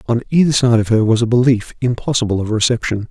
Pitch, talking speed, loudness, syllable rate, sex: 120 Hz, 210 wpm, -15 LUFS, 6.4 syllables/s, male